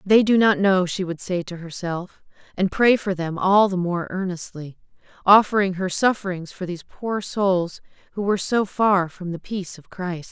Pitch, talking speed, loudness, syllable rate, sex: 185 Hz, 190 wpm, -21 LUFS, 4.8 syllables/s, female